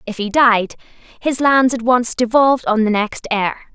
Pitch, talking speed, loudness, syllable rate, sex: 235 Hz, 190 wpm, -16 LUFS, 4.6 syllables/s, female